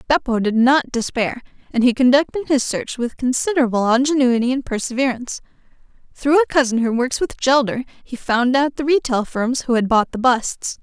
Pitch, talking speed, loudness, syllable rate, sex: 255 Hz, 175 wpm, -18 LUFS, 5.4 syllables/s, female